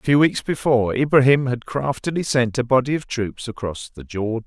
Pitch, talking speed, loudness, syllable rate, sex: 125 Hz, 200 wpm, -20 LUFS, 5.5 syllables/s, male